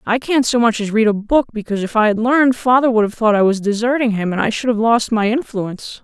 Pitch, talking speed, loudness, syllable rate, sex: 225 Hz, 280 wpm, -16 LUFS, 6.2 syllables/s, female